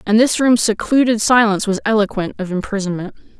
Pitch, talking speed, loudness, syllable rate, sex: 215 Hz, 160 wpm, -16 LUFS, 6.0 syllables/s, female